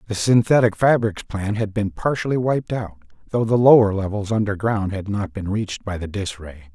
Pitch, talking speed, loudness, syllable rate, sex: 105 Hz, 195 wpm, -20 LUFS, 5.3 syllables/s, male